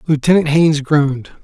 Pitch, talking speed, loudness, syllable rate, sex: 150 Hz, 125 wpm, -14 LUFS, 5.9 syllables/s, male